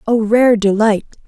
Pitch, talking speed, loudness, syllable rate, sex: 220 Hz, 140 wpm, -14 LUFS, 4.2 syllables/s, female